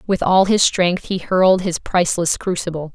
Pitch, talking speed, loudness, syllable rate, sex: 180 Hz, 185 wpm, -17 LUFS, 5.0 syllables/s, female